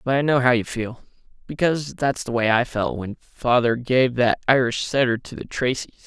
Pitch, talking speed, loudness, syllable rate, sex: 125 Hz, 210 wpm, -21 LUFS, 5.1 syllables/s, male